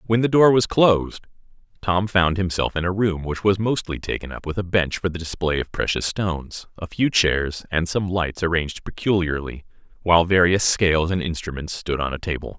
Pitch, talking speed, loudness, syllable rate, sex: 90 Hz, 200 wpm, -21 LUFS, 5.3 syllables/s, male